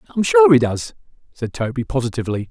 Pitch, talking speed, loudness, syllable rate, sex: 120 Hz, 165 wpm, -17 LUFS, 6.3 syllables/s, male